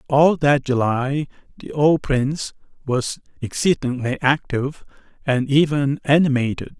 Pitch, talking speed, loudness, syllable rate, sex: 140 Hz, 105 wpm, -20 LUFS, 4.4 syllables/s, male